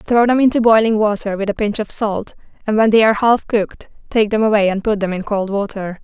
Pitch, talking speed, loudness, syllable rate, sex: 210 Hz, 250 wpm, -16 LUFS, 5.8 syllables/s, female